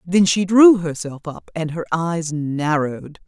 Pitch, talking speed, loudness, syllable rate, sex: 165 Hz, 165 wpm, -18 LUFS, 4.0 syllables/s, female